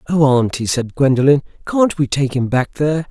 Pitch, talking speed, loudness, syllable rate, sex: 140 Hz, 195 wpm, -16 LUFS, 5.3 syllables/s, male